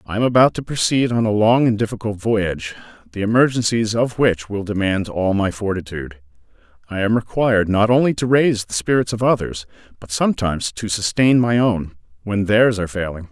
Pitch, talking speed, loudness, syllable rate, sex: 105 Hz, 185 wpm, -18 LUFS, 5.7 syllables/s, male